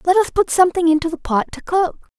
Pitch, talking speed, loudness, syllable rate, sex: 340 Hz, 245 wpm, -18 LUFS, 6.2 syllables/s, female